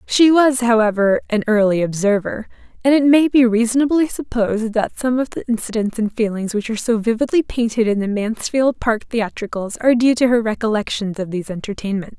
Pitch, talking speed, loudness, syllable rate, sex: 225 Hz, 180 wpm, -18 LUFS, 5.7 syllables/s, female